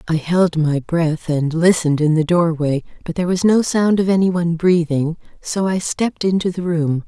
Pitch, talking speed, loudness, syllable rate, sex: 170 Hz, 205 wpm, -17 LUFS, 5.2 syllables/s, female